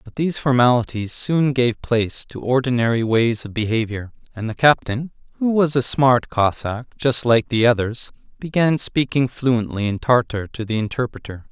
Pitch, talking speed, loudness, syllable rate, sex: 125 Hz, 160 wpm, -19 LUFS, 4.8 syllables/s, male